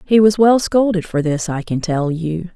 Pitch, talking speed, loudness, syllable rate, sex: 180 Hz, 235 wpm, -16 LUFS, 4.5 syllables/s, female